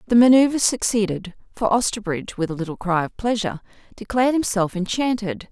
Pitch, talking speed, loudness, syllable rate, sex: 215 Hz, 150 wpm, -21 LUFS, 6.1 syllables/s, female